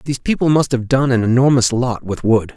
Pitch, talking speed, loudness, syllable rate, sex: 125 Hz, 235 wpm, -16 LUFS, 5.8 syllables/s, male